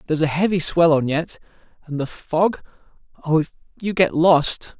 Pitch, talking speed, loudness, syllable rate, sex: 160 Hz, 150 wpm, -20 LUFS, 5.0 syllables/s, male